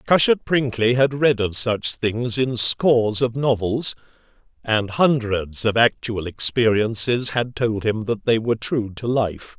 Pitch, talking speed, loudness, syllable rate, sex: 115 Hz, 155 wpm, -20 LUFS, 4.0 syllables/s, male